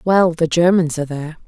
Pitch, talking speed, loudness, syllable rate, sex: 165 Hz, 205 wpm, -16 LUFS, 6.1 syllables/s, female